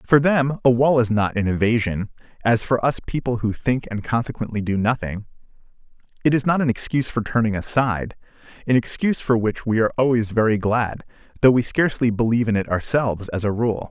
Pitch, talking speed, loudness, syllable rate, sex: 115 Hz, 195 wpm, -21 LUFS, 5.9 syllables/s, male